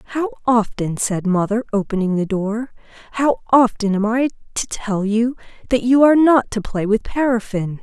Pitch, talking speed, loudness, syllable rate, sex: 225 Hz, 160 wpm, -18 LUFS, 5.0 syllables/s, female